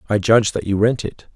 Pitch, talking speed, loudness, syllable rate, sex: 105 Hz, 265 wpm, -18 LUFS, 6.3 syllables/s, male